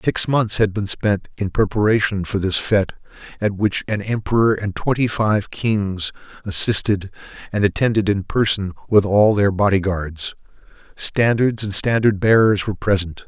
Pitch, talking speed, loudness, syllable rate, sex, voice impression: 105 Hz, 155 wpm, -19 LUFS, 4.7 syllables/s, male, very masculine, very middle-aged, very thick, tensed, very powerful, dark, soft, muffled, slightly fluent, cool, very intellectual, slightly refreshing, sincere, very calm, very mature, friendly, very reassuring, very unique, slightly elegant, very wild, sweet, slightly lively, kind, modest